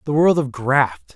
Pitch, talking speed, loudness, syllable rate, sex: 135 Hz, 210 wpm, -18 LUFS, 4.0 syllables/s, male